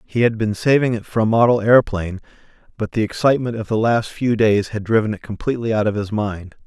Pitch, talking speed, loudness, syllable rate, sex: 110 Hz, 225 wpm, -18 LUFS, 6.1 syllables/s, male